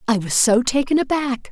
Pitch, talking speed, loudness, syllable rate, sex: 250 Hz, 200 wpm, -18 LUFS, 5.2 syllables/s, female